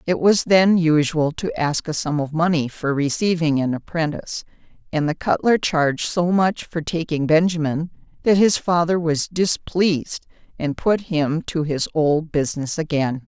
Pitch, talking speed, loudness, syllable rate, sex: 160 Hz, 160 wpm, -20 LUFS, 4.5 syllables/s, female